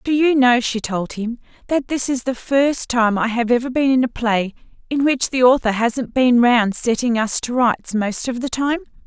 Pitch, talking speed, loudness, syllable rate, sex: 245 Hz, 225 wpm, -18 LUFS, 4.6 syllables/s, female